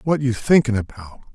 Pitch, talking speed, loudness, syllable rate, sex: 125 Hz, 180 wpm, -19 LUFS, 6.6 syllables/s, male